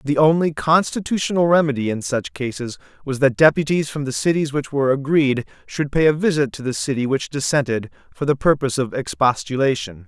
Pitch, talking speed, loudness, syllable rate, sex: 140 Hz, 180 wpm, -19 LUFS, 5.7 syllables/s, male